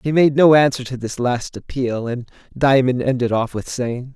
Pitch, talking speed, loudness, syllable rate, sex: 130 Hz, 200 wpm, -18 LUFS, 4.8 syllables/s, male